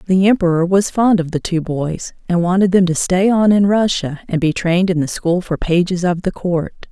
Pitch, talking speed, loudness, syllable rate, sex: 180 Hz, 235 wpm, -16 LUFS, 5.1 syllables/s, female